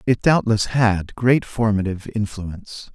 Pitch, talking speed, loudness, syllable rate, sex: 110 Hz, 120 wpm, -20 LUFS, 4.4 syllables/s, male